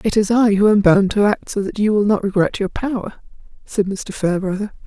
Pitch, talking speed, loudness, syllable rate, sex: 205 Hz, 235 wpm, -17 LUFS, 5.6 syllables/s, female